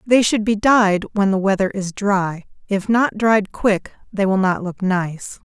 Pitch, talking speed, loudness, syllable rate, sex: 200 Hz, 185 wpm, -18 LUFS, 4.0 syllables/s, female